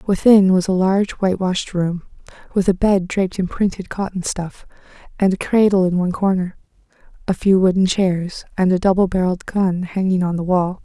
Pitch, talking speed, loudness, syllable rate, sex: 185 Hz, 185 wpm, -18 LUFS, 5.5 syllables/s, female